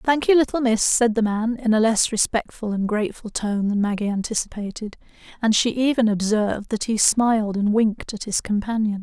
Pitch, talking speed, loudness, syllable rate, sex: 220 Hz, 195 wpm, -21 LUFS, 5.4 syllables/s, female